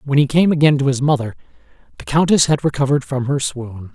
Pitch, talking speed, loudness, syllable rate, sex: 140 Hz, 215 wpm, -16 LUFS, 6.3 syllables/s, male